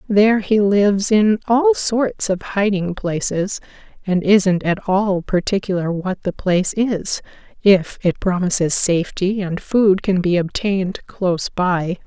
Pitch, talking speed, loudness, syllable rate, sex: 195 Hz, 145 wpm, -18 LUFS, 4.1 syllables/s, female